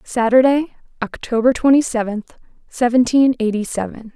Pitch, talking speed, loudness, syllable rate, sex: 240 Hz, 100 wpm, -16 LUFS, 4.9 syllables/s, female